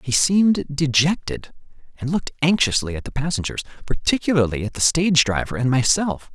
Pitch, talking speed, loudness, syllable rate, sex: 145 Hz, 150 wpm, -20 LUFS, 5.7 syllables/s, male